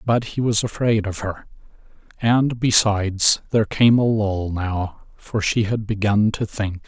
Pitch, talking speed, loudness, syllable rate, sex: 105 Hz, 165 wpm, -20 LUFS, 4.2 syllables/s, male